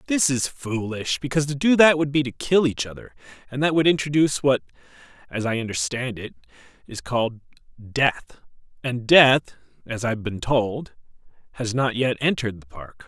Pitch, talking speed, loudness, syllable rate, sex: 125 Hz, 175 wpm, -22 LUFS, 5.3 syllables/s, male